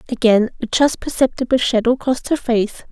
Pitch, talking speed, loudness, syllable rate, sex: 245 Hz, 165 wpm, -17 LUFS, 5.7 syllables/s, female